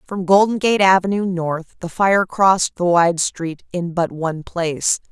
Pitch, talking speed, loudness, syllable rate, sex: 180 Hz, 175 wpm, -18 LUFS, 4.4 syllables/s, female